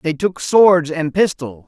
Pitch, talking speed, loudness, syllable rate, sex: 165 Hz, 180 wpm, -15 LUFS, 3.8 syllables/s, male